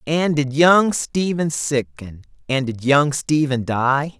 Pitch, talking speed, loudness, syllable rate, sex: 140 Hz, 145 wpm, -18 LUFS, 3.4 syllables/s, male